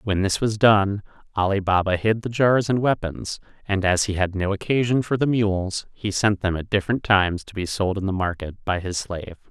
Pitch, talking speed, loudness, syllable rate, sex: 100 Hz, 220 wpm, -22 LUFS, 5.2 syllables/s, male